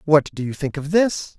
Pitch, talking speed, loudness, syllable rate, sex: 155 Hz, 260 wpm, -21 LUFS, 4.7 syllables/s, male